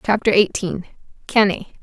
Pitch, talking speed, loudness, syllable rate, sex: 200 Hz, 100 wpm, -18 LUFS, 4.8 syllables/s, female